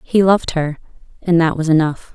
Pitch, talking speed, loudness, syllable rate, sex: 165 Hz, 195 wpm, -16 LUFS, 5.5 syllables/s, female